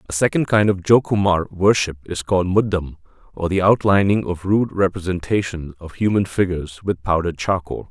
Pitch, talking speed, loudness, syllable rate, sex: 95 Hz, 160 wpm, -19 LUFS, 5.6 syllables/s, male